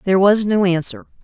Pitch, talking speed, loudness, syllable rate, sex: 185 Hz, 195 wpm, -16 LUFS, 6.2 syllables/s, female